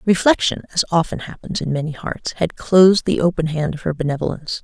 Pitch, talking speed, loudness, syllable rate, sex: 165 Hz, 195 wpm, -19 LUFS, 6.0 syllables/s, female